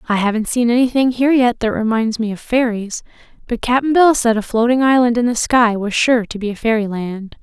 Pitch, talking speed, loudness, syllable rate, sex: 235 Hz, 220 wpm, -16 LUFS, 5.5 syllables/s, female